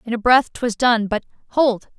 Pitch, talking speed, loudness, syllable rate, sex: 235 Hz, 180 wpm, -18 LUFS, 4.6 syllables/s, female